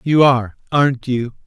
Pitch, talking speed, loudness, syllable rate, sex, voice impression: 125 Hz, 165 wpm, -17 LUFS, 5.3 syllables/s, male, very masculine, very adult-like, slightly old, very thick, tensed, very powerful, slightly dark, slightly hard, slightly muffled, fluent, very cool, intellectual, very sincere, very calm, very mature, very friendly, very reassuring, very unique, wild, kind, very modest